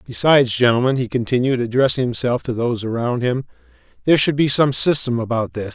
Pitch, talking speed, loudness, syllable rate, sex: 125 Hz, 180 wpm, -18 LUFS, 6.2 syllables/s, male